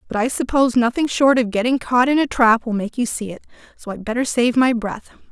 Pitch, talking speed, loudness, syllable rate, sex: 240 Hz, 250 wpm, -18 LUFS, 5.9 syllables/s, female